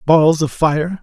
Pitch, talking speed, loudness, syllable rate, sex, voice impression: 155 Hz, 175 wpm, -15 LUFS, 3.3 syllables/s, male, masculine, adult-like, slightly thick, tensed, powerful, bright, clear, slightly halting, slightly mature, friendly, slightly unique, wild, lively, slightly sharp